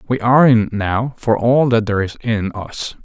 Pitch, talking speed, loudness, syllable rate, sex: 115 Hz, 215 wpm, -16 LUFS, 4.8 syllables/s, male